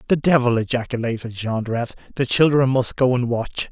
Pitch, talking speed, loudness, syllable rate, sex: 125 Hz, 160 wpm, -20 LUFS, 5.5 syllables/s, male